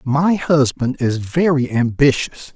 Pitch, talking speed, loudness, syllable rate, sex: 140 Hz, 115 wpm, -17 LUFS, 3.7 syllables/s, male